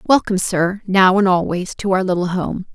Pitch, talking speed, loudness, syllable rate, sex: 190 Hz, 195 wpm, -17 LUFS, 5.2 syllables/s, female